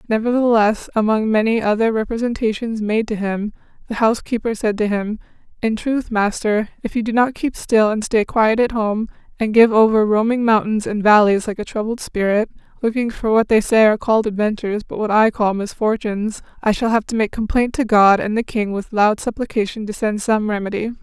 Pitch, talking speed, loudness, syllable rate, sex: 220 Hz, 195 wpm, -18 LUFS, 5.5 syllables/s, female